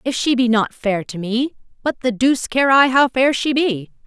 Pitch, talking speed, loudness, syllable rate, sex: 245 Hz, 235 wpm, -17 LUFS, 4.8 syllables/s, female